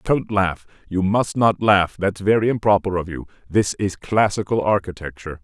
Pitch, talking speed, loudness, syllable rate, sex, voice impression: 100 Hz, 165 wpm, -20 LUFS, 4.9 syllables/s, male, masculine, adult-like, thick, tensed, powerful, slightly hard, clear, fluent, cool, intellectual, sincere, wild, lively, slightly strict